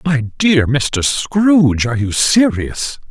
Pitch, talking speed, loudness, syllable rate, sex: 145 Hz, 135 wpm, -14 LUFS, 3.4 syllables/s, male